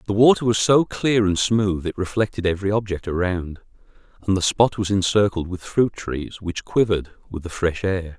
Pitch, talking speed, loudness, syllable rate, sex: 100 Hz, 190 wpm, -21 LUFS, 5.2 syllables/s, male